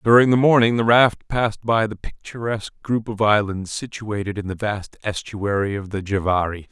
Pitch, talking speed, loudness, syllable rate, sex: 105 Hz, 180 wpm, -20 LUFS, 5.1 syllables/s, male